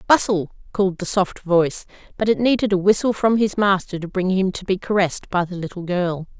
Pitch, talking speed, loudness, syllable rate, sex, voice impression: 190 Hz, 215 wpm, -20 LUFS, 5.8 syllables/s, female, feminine, middle-aged, tensed, bright, clear, fluent, intellectual, slightly friendly, unique, elegant, lively, slightly sharp